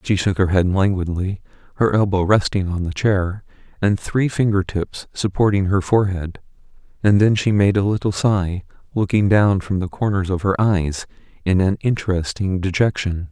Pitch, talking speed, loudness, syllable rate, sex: 95 Hz, 165 wpm, -19 LUFS, 4.9 syllables/s, male